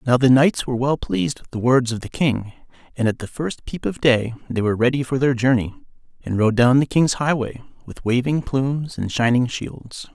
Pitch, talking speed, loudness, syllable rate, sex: 125 Hz, 220 wpm, -20 LUFS, 5.2 syllables/s, male